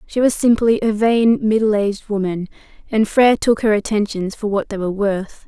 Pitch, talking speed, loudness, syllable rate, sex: 210 Hz, 195 wpm, -17 LUFS, 5.3 syllables/s, female